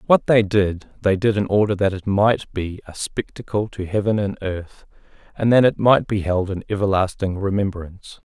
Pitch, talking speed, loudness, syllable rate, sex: 100 Hz, 190 wpm, -20 LUFS, 4.9 syllables/s, male